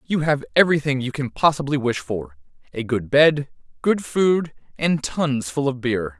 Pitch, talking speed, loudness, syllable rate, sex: 145 Hz, 175 wpm, -21 LUFS, 4.5 syllables/s, male